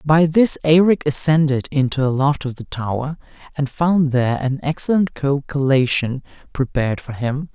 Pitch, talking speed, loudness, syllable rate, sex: 140 Hz, 160 wpm, -18 LUFS, 4.8 syllables/s, male